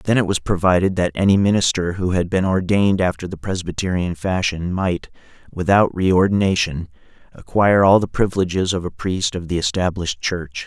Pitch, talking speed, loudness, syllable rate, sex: 95 Hz, 165 wpm, -19 LUFS, 5.5 syllables/s, male